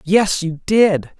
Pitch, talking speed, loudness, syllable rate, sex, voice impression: 185 Hz, 150 wpm, -16 LUFS, 2.9 syllables/s, male, masculine, adult-like, slightly fluent, slightly cool, slightly refreshing, sincere